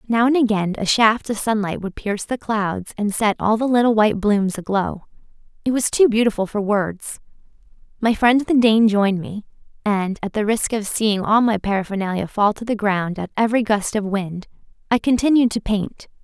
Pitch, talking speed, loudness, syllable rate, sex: 215 Hz, 190 wpm, -19 LUFS, 5.1 syllables/s, female